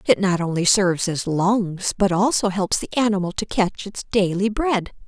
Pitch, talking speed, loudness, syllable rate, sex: 195 Hz, 190 wpm, -20 LUFS, 4.7 syllables/s, female